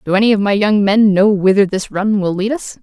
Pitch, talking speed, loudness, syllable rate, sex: 200 Hz, 275 wpm, -14 LUFS, 5.6 syllables/s, female